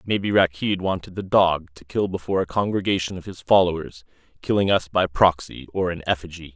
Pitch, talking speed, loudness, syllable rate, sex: 90 Hz, 185 wpm, -22 LUFS, 5.6 syllables/s, male